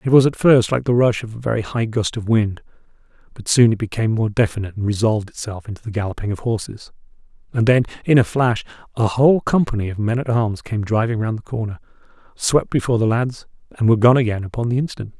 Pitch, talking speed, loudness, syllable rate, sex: 115 Hz, 220 wpm, -19 LUFS, 6.4 syllables/s, male